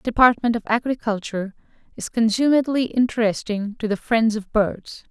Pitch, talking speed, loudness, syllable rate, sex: 225 Hz, 130 wpm, -21 LUFS, 5.0 syllables/s, female